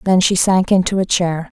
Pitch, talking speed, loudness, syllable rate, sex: 185 Hz, 225 wpm, -15 LUFS, 5.0 syllables/s, female